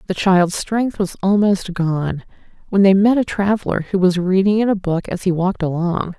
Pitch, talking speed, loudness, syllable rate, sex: 190 Hz, 205 wpm, -17 LUFS, 5.1 syllables/s, female